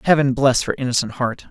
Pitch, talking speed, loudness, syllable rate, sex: 130 Hz, 200 wpm, -19 LUFS, 5.8 syllables/s, male